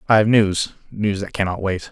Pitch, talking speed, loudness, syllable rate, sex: 100 Hz, 220 wpm, -20 LUFS, 5.0 syllables/s, male